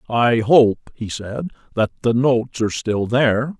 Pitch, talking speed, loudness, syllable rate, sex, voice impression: 120 Hz, 165 wpm, -19 LUFS, 4.4 syllables/s, male, masculine, adult-like, slightly thick, slightly muffled, slightly intellectual, slightly calm, slightly wild